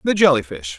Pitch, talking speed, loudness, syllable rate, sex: 130 Hz, 230 wpm, -17 LUFS, 6.2 syllables/s, male